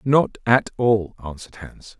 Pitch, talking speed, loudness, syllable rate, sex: 110 Hz, 150 wpm, -19 LUFS, 4.3 syllables/s, male